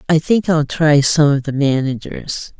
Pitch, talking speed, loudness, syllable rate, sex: 150 Hz, 185 wpm, -16 LUFS, 4.2 syllables/s, female